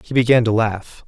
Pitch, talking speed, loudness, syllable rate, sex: 115 Hz, 225 wpm, -17 LUFS, 5.2 syllables/s, male